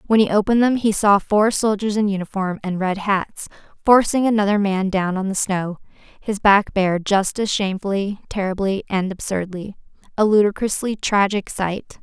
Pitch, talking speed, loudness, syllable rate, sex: 200 Hz, 160 wpm, -19 LUFS, 5.1 syllables/s, female